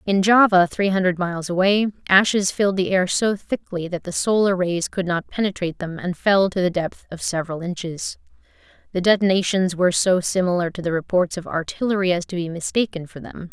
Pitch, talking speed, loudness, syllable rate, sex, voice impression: 185 Hz, 195 wpm, -20 LUFS, 5.7 syllables/s, female, feminine, adult-like, fluent, slightly intellectual, slightly unique